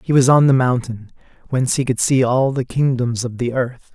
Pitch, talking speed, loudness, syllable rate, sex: 125 Hz, 230 wpm, -17 LUFS, 5.2 syllables/s, male